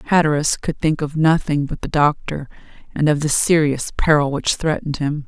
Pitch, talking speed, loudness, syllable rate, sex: 150 Hz, 180 wpm, -18 LUFS, 5.3 syllables/s, female